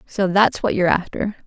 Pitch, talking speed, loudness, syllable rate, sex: 195 Hz, 205 wpm, -19 LUFS, 5.7 syllables/s, female